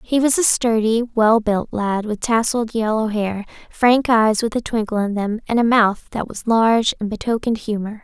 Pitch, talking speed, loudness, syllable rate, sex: 220 Hz, 200 wpm, -18 LUFS, 4.9 syllables/s, female